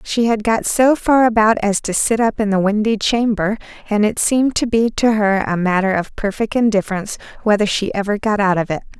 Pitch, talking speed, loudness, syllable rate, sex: 215 Hz, 220 wpm, -17 LUFS, 5.5 syllables/s, female